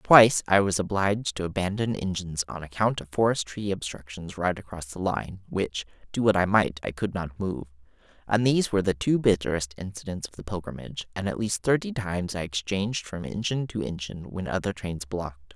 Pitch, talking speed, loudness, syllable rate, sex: 95 Hz, 195 wpm, -27 LUFS, 5.6 syllables/s, male